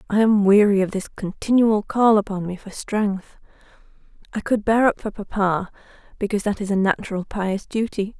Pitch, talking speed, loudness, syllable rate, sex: 205 Hz, 175 wpm, -21 LUFS, 5.3 syllables/s, female